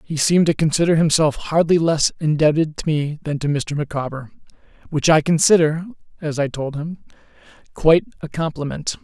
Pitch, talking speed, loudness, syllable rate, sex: 155 Hz, 160 wpm, -19 LUFS, 5.4 syllables/s, male